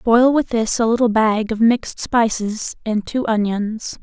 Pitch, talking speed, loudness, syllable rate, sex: 225 Hz, 180 wpm, -18 LUFS, 4.2 syllables/s, female